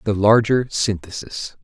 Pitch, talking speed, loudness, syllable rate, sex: 105 Hz, 110 wpm, -19 LUFS, 4.1 syllables/s, male